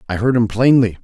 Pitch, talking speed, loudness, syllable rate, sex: 115 Hz, 230 wpm, -15 LUFS, 6.0 syllables/s, male